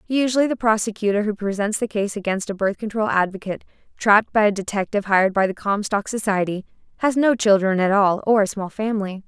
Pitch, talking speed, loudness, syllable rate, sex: 205 Hz, 195 wpm, -20 LUFS, 6.2 syllables/s, female